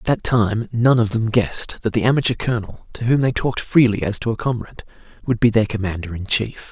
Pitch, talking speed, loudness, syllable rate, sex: 115 Hz, 230 wpm, -19 LUFS, 6.0 syllables/s, male